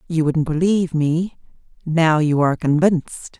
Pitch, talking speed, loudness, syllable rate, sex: 160 Hz, 140 wpm, -18 LUFS, 5.3 syllables/s, female